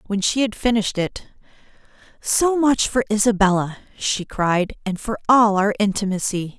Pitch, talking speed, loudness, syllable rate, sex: 210 Hz, 135 wpm, -20 LUFS, 4.8 syllables/s, female